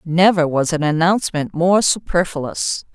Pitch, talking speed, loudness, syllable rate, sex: 170 Hz, 120 wpm, -17 LUFS, 4.3 syllables/s, female